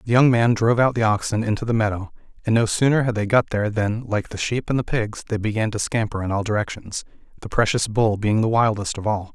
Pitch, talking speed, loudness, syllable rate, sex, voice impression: 110 Hz, 250 wpm, -21 LUFS, 6.0 syllables/s, male, very masculine, very adult-like, very middle-aged, very thick, slightly tensed, powerful, slightly dark, soft, muffled, fluent, very cool, intellectual, very sincere, very calm, very mature, very friendly, very reassuring, very unique, elegant, very wild, sweet, slightly lively, kind, slightly modest